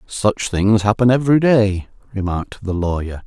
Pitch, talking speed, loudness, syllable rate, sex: 105 Hz, 145 wpm, -17 LUFS, 4.9 syllables/s, male